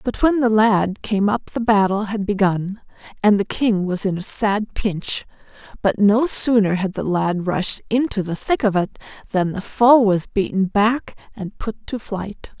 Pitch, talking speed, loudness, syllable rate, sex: 205 Hz, 190 wpm, -19 LUFS, 4.2 syllables/s, female